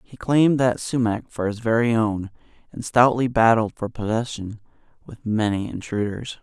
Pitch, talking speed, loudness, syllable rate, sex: 115 Hz, 150 wpm, -22 LUFS, 4.8 syllables/s, male